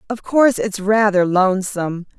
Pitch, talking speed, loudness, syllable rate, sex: 200 Hz, 135 wpm, -17 LUFS, 5.2 syllables/s, female